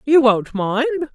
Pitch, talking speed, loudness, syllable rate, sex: 265 Hz, 155 wpm, -18 LUFS, 3.9 syllables/s, female